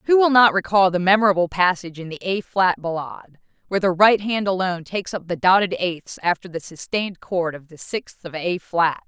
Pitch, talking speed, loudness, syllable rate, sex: 185 Hz, 210 wpm, -20 LUFS, 5.5 syllables/s, female